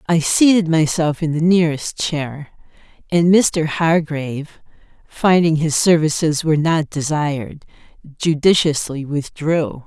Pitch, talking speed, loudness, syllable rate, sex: 155 Hz, 110 wpm, -17 LUFS, 4.2 syllables/s, female